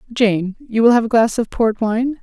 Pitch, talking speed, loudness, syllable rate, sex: 225 Hz, 245 wpm, -16 LUFS, 4.7 syllables/s, female